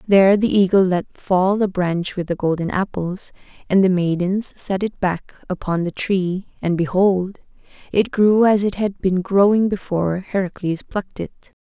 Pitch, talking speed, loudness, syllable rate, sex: 190 Hz, 170 wpm, -19 LUFS, 4.5 syllables/s, female